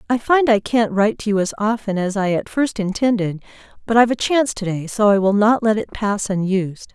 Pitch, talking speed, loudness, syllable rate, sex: 210 Hz, 240 wpm, -18 LUFS, 5.8 syllables/s, female